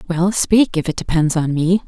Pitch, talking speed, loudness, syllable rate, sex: 175 Hz, 225 wpm, -17 LUFS, 4.7 syllables/s, female